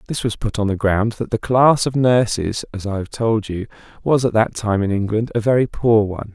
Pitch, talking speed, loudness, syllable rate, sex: 110 Hz, 245 wpm, -19 LUFS, 5.3 syllables/s, male